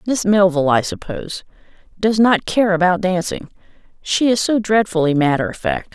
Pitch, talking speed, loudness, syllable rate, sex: 190 Hz, 160 wpm, -17 LUFS, 5.2 syllables/s, female